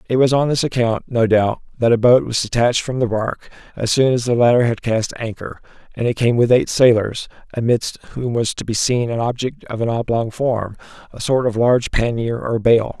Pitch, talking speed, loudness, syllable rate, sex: 120 Hz, 215 wpm, -18 LUFS, 5.2 syllables/s, male